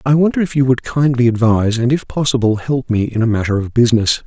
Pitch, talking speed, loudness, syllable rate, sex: 125 Hz, 240 wpm, -15 LUFS, 6.2 syllables/s, male